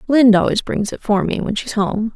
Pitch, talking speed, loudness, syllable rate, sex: 220 Hz, 250 wpm, -17 LUFS, 5.6 syllables/s, female